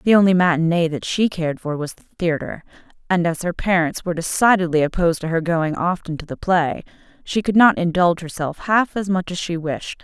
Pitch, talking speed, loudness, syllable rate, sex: 170 Hz, 210 wpm, -19 LUFS, 5.7 syllables/s, female